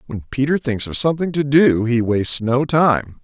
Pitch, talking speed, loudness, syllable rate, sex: 130 Hz, 205 wpm, -17 LUFS, 5.0 syllables/s, male